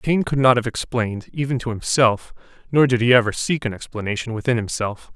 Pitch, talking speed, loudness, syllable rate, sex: 120 Hz, 200 wpm, -20 LUFS, 5.7 syllables/s, male